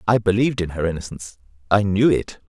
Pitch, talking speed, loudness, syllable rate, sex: 100 Hz, 190 wpm, -20 LUFS, 6.6 syllables/s, male